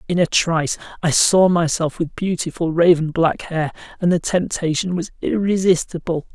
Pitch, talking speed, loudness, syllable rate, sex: 170 Hz, 150 wpm, -19 LUFS, 4.9 syllables/s, male